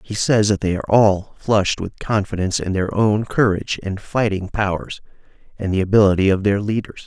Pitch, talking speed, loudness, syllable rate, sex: 100 Hz, 185 wpm, -19 LUFS, 5.5 syllables/s, male